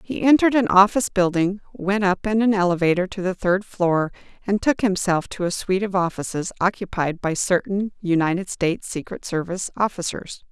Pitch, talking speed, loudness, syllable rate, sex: 190 Hz, 170 wpm, -21 LUFS, 5.5 syllables/s, female